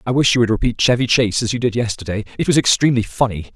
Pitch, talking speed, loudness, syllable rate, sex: 115 Hz, 255 wpm, -17 LUFS, 7.3 syllables/s, male